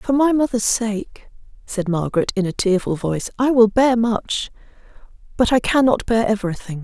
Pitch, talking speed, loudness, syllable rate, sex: 220 Hz, 165 wpm, -19 LUFS, 5.1 syllables/s, female